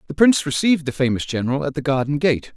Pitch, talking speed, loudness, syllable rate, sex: 150 Hz, 235 wpm, -19 LUFS, 7.2 syllables/s, male